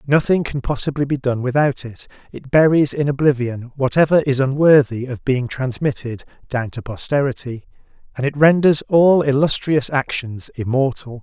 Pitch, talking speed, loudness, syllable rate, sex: 135 Hz, 145 wpm, -18 LUFS, 4.9 syllables/s, male